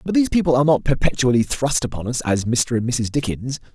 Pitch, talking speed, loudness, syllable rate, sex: 130 Hz, 225 wpm, -20 LUFS, 6.3 syllables/s, male